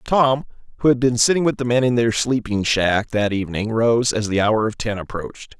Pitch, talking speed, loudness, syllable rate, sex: 115 Hz, 225 wpm, -19 LUFS, 5.3 syllables/s, male